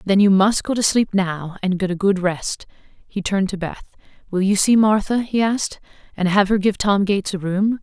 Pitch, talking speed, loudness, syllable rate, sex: 195 Hz, 230 wpm, -19 LUFS, 5.1 syllables/s, female